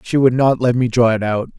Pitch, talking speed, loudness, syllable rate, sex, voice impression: 120 Hz, 300 wpm, -16 LUFS, 5.7 syllables/s, male, masculine, adult-like, thick, tensed, powerful, slightly hard, clear, raspy, cool, intellectual, mature, wild, lively, slightly strict, intense